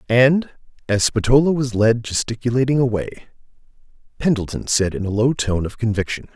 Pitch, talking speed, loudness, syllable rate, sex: 120 Hz, 140 wpm, -19 LUFS, 5.5 syllables/s, male